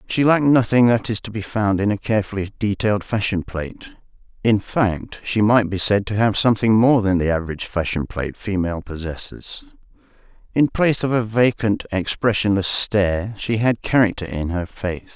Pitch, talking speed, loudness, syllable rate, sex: 105 Hz, 170 wpm, -20 LUFS, 5.4 syllables/s, male